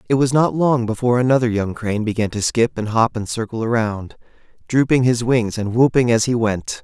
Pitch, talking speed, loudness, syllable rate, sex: 115 Hz, 210 wpm, -18 LUFS, 5.5 syllables/s, male